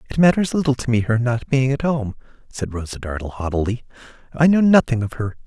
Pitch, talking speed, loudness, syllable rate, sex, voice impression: 125 Hz, 210 wpm, -19 LUFS, 6.0 syllables/s, male, very masculine, slightly middle-aged, slightly thick, slightly tensed, powerful, bright, soft, slightly muffled, fluent, raspy, cool, intellectual, slightly refreshing, sincere, very calm, mature, very friendly, reassuring, unique, elegant, slightly wild, sweet, slightly lively, kind, very modest